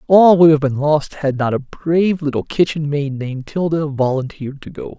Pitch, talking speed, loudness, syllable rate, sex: 150 Hz, 205 wpm, -16 LUFS, 5.2 syllables/s, male